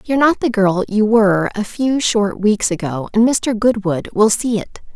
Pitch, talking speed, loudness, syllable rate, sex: 215 Hz, 205 wpm, -16 LUFS, 4.6 syllables/s, female